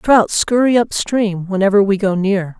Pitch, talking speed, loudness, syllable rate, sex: 205 Hz, 185 wpm, -15 LUFS, 4.3 syllables/s, female